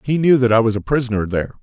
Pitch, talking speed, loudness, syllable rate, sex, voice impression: 120 Hz, 295 wpm, -17 LUFS, 7.6 syllables/s, male, very masculine, very middle-aged, very thick, tensed, very powerful, bright, soft, muffled, fluent, slightly raspy, cool, very intellectual, refreshing, sincere, very calm, very mature, very friendly, reassuring, unique, elegant, very wild, sweet, lively, kind, slightly intense